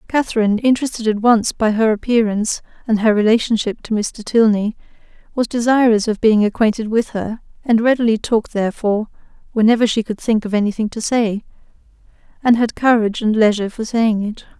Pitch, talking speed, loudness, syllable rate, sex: 220 Hz, 165 wpm, -17 LUFS, 6.0 syllables/s, female